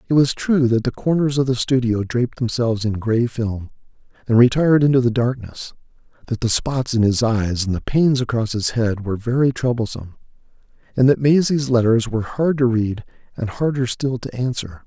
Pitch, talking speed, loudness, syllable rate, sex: 120 Hz, 190 wpm, -19 LUFS, 5.4 syllables/s, male